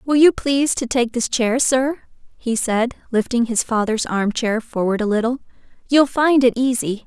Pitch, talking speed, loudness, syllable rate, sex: 240 Hz, 185 wpm, -18 LUFS, 4.7 syllables/s, female